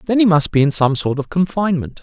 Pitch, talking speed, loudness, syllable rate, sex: 165 Hz, 265 wpm, -16 LUFS, 6.0 syllables/s, male